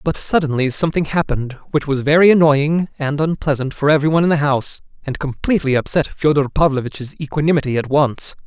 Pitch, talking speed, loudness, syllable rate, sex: 145 Hz, 170 wpm, -17 LUFS, 6.3 syllables/s, male